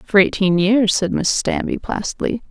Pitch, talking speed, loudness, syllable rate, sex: 205 Hz, 170 wpm, -18 LUFS, 4.6 syllables/s, female